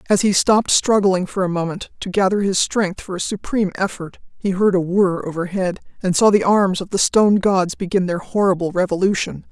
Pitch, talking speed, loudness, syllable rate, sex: 190 Hz, 200 wpm, -18 LUFS, 5.5 syllables/s, female